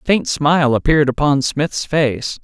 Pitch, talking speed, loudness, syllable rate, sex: 145 Hz, 175 wpm, -16 LUFS, 4.8 syllables/s, male